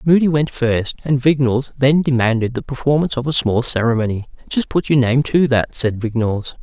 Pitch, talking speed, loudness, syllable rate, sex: 130 Hz, 190 wpm, -17 LUFS, 5.5 syllables/s, male